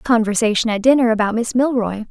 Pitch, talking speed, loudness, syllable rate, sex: 230 Hz, 170 wpm, -17 LUFS, 5.9 syllables/s, female